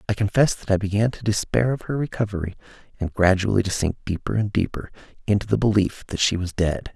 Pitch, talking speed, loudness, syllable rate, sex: 100 Hz, 205 wpm, -23 LUFS, 6.2 syllables/s, male